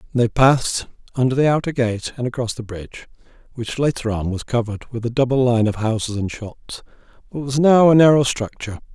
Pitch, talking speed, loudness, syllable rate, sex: 125 Hz, 195 wpm, -19 LUFS, 5.8 syllables/s, male